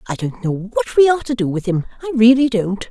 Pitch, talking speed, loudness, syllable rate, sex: 220 Hz, 270 wpm, -17 LUFS, 5.9 syllables/s, female